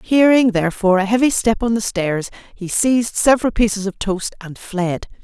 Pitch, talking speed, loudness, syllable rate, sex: 210 Hz, 185 wpm, -17 LUFS, 5.2 syllables/s, female